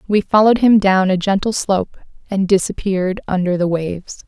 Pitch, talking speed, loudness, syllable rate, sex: 195 Hz, 170 wpm, -16 LUFS, 5.6 syllables/s, female